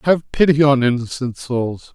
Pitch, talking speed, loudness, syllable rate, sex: 135 Hz, 155 wpm, -17 LUFS, 4.4 syllables/s, male